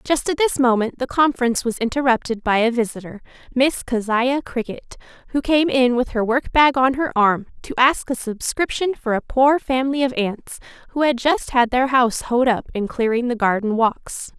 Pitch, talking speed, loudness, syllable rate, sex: 250 Hz, 195 wpm, -19 LUFS, 5.0 syllables/s, female